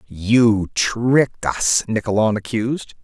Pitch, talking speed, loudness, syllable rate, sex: 110 Hz, 100 wpm, -18 LUFS, 3.6 syllables/s, male